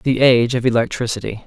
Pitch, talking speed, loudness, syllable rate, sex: 120 Hz, 165 wpm, -17 LUFS, 6.3 syllables/s, male